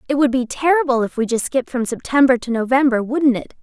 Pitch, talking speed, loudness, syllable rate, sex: 255 Hz, 230 wpm, -18 LUFS, 6.2 syllables/s, female